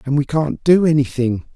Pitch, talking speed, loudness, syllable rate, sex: 145 Hz, 195 wpm, -17 LUFS, 5.2 syllables/s, male